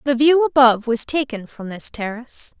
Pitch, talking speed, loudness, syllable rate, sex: 250 Hz, 185 wpm, -18 LUFS, 5.4 syllables/s, female